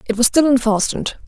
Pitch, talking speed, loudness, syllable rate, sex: 245 Hz, 190 wpm, -16 LUFS, 6.4 syllables/s, female